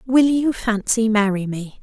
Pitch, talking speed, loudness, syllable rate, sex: 225 Hz, 165 wpm, -19 LUFS, 4.1 syllables/s, female